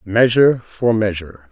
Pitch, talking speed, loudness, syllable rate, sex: 105 Hz, 120 wpm, -16 LUFS, 5.0 syllables/s, male